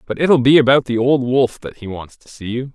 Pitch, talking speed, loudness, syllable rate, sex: 125 Hz, 285 wpm, -15 LUFS, 5.4 syllables/s, male